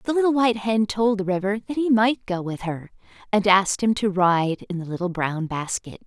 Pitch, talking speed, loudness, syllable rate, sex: 200 Hz, 230 wpm, -22 LUFS, 5.3 syllables/s, female